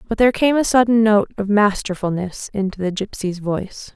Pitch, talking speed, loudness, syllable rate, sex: 205 Hz, 180 wpm, -18 LUFS, 5.4 syllables/s, female